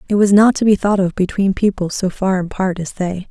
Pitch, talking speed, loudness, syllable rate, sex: 190 Hz, 255 wpm, -16 LUFS, 5.5 syllables/s, female